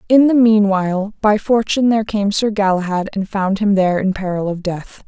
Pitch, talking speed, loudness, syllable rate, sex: 200 Hz, 200 wpm, -16 LUFS, 5.5 syllables/s, female